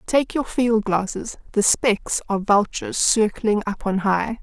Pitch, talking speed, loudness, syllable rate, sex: 215 Hz, 165 wpm, -21 LUFS, 4.2 syllables/s, female